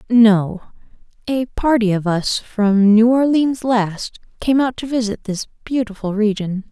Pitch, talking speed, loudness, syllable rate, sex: 225 Hz, 145 wpm, -17 LUFS, 4.0 syllables/s, female